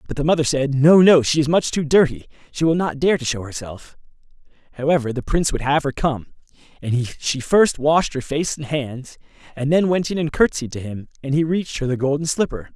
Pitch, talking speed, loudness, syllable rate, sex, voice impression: 145 Hz, 225 wpm, -19 LUFS, 5.6 syllables/s, male, masculine, adult-like, slightly middle-aged, thick, tensed, slightly powerful, bright, slightly hard, clear, very fluent, cool, intellectual, very refreshing, very sincere, slightly calm, slightly mature, friendly, reassuring, slightly elegant, wild, slightly sweet, very lively, intense